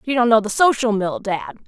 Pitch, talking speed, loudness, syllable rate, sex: 225 Hz, 250 wpm, -18 LUFS, 5.5 syllables/s, female